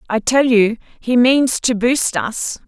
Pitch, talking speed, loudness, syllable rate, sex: 240 Hz, 180 wpm, -16 LUFS, 3.5 syllables/s, female